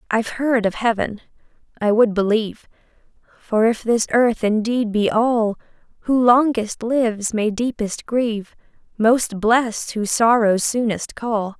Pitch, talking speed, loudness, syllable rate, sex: 225 Hz, 130 wpm, -19 LUFS, 4.1 syllables/s, female